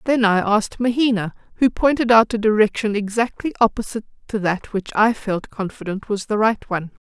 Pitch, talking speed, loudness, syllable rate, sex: 215 Hz, 180 wpm, -19 LUFS, 5.6 syllables/s, female